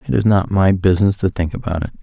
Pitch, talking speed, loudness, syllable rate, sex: 95 Hz, 265 wpm, -17 LUFS, 6.8 syllables/s, male